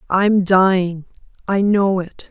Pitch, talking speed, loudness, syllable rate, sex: 190 Hz, 105 wpm, -16 LUFS, 3.6 syllables/s, female